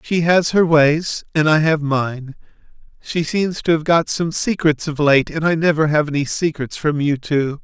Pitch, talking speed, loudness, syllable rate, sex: 155 Hz, 205 wpm, -17 LUFS, 4.4 syllables/s, male